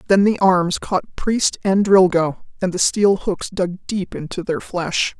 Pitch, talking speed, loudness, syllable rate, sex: 185 Hz, 185 wpm, -19 LUFS, 3.8 syllables/s, female